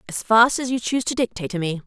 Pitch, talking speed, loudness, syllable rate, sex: 220 Hz, 290 wpm, -20 LUFS, 7.2 syllables/s, female